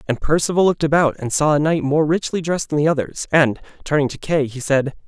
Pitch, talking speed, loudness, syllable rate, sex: 150 Hz, 235 wpm, -18 LUFS, 6.2 syllables/s, male